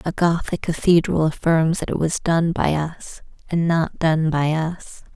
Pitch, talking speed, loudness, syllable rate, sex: 165 Hz, 175 wpm, -20 LUFS, 4.1 syllables/s, female